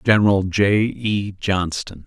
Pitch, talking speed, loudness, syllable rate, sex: 100 Hz, 115 wpm, -19 LUFS, 3.6 syllables/s, male